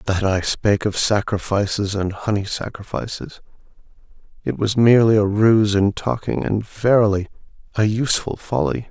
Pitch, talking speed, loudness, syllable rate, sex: 105 Hz, 135 wpm, -19 LUFS, 4.9 syllables/s, male